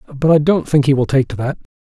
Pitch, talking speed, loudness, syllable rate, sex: 140 Hz, 295 wpm, -15 LUFS, 6.7 syllables/s, male